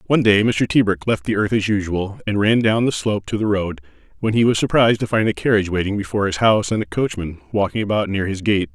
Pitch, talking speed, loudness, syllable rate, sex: 105 Hz, 255 wpm, -19 LUFS, 6.5 syllables/s, male